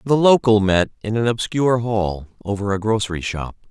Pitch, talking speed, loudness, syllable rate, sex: 105 Hz, 180 wpm, -19 LUFS, 5.5 syllables/s, male